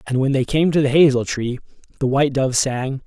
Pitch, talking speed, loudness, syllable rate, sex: 135 Hz, 235 wpm, -18 LUFS, 5.6 syllables/s, male